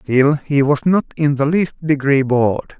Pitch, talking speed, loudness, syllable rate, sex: 145 Hz, 195 wpm, -16 LUFS, 4.3 syllables/s, male